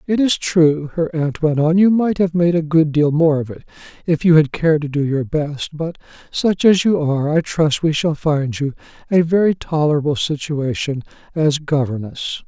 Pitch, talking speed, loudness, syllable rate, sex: 155 Hz, 200 wpm, -17 LUFS, 4.8 syllables/s, male